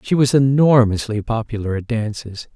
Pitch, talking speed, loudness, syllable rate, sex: 120 Hz, 140 wpm, -17 LUFS, 5.0 syllables/s, male